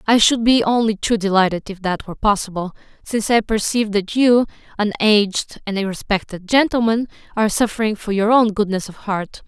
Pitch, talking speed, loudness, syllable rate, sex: 210 Hz, 175 wpm, -18 LUFS, 5.5 syllables/s, female